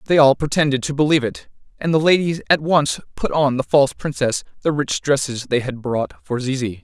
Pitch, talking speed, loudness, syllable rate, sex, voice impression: 140 Hz, 210 wpm, -19 LUFS, 5.6 syllables/s, male, very masculine, very adult-like, slightly middle-aged, slightly thick, very tensed, very powerful, slightly dark, hard, clear, fluent, very cool, very intellectual, slightly refreshing, sincere, slightly calm, friendly, reassuring, very unique, very wild, sweet, very lively, very strict, intense